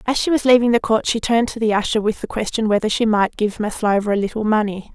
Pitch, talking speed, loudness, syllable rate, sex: 220 Hz, 265 wpm, -18 LUFS, 6.4 syllables/s, female